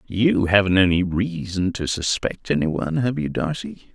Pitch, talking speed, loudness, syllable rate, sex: 105 Hz, 165 wpm, -21 LUFS, 4.7 syllables/s, male